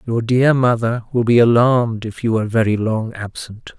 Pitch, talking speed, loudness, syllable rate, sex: 115 Hz, 190 wpm, -16 LUFS, 5.0 syllables/s, male